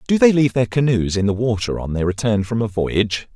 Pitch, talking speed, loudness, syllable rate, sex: 110 Hz, 250 wpm, -19 LUFS, 6.0 syllables/s, male